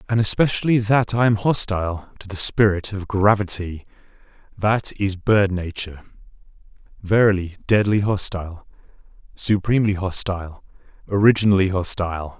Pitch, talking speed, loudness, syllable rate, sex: 100 Hz, 100 wpm, -20 LUFS, 5.2 syllables/s, male